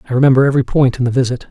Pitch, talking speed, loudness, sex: 130 Hz, 280 wpm, -14 LUFS, male